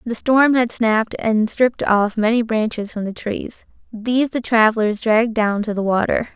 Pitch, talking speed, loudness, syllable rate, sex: 225 Hz, 190 wpm, -18 LUFS, 4.9 syllables/s, female